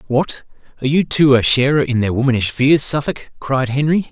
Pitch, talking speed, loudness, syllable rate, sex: 135 Hz, 190 wpm, -15 LUFS, 5.4 syllables/s, male